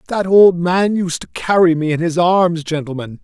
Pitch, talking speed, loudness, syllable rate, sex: 170 Hz, 205 wpm, -15 LUFS, 4.6 syllables/s, male